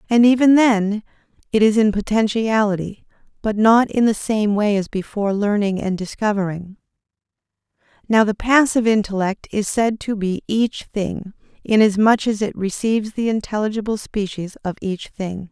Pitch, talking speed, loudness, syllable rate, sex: 210 Hz, 145 wpm, -19 LUFS, 4.9 syllables/s, female